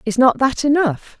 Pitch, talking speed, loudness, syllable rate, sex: 250 Hz, 200 wpm, -16 LUFS, 4.7 syllables/s, female